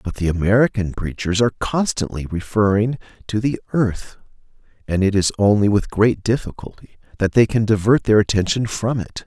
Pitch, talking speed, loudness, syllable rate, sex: 105 Hz, 160 wpm, -19 LUFS, 5.4 syllables/s, male